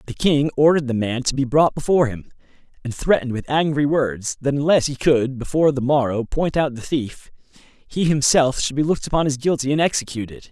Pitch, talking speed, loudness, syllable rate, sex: 140 Hz, 205 wpm, -19 LUFS, 5.7 syllables/s, male